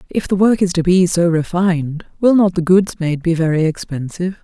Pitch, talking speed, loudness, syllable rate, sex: 175 Hz, 215 wpm, -16 LUFS, 5.5 syllables/s, female